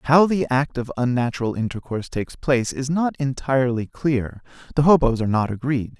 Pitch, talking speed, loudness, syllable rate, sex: 130 Hz, 170 wpm, -21 LUFS, 5.8 syllables/s, male